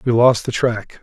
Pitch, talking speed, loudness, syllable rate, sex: 115 Hz, 235 wpm, -17 LUFS, 4.3 syllables/s, male